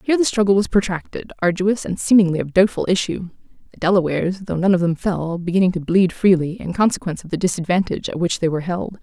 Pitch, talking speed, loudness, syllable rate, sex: 185 Hz, 215 wpm, -19 LUFS, 6.6 syllables/s, female